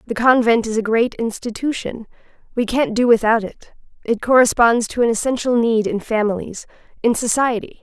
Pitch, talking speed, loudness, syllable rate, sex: 230 Hz, 160 wpm, -18 LUFS, 5.2 syllables/s, female